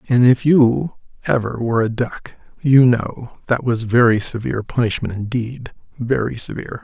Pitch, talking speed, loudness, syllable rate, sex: 120 Hz, 150 wpm, -18 LUFS, 4.8 syllables/s, male